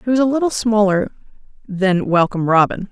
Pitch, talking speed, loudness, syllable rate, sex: 205 Hz, 165 wpm, -16 LUFS, 5.7 syllables/s, female